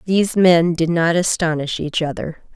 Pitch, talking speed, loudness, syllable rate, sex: 170 Hz, 165 wpm, -17 LUFS, 4.7 syllables/s, female